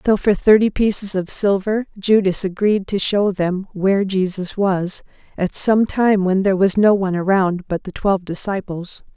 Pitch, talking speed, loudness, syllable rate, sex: 195 Hz, 175 wpm, -18 LUFS, 4.8 syllables/s, female